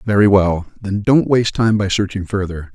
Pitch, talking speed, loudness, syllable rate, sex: 100 Hz, 195 wpm, -16 LUFS, 5.2 syllables/s, male